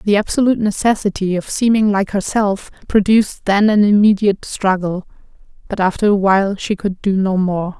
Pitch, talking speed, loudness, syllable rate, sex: 200 Hz, 160 wpm, -16 LUFS, 5.3 syllables/s, female